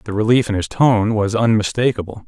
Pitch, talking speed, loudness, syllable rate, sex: 105 Hz, 185 wpm, -17 LUFS, 5.4 syllables/s, male